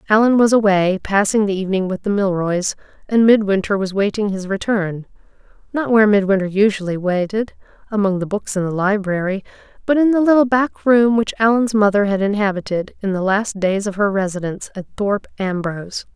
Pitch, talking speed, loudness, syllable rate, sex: 200 Hz, 170 wpm, -17 LUFS, 5.6 syllables/s, female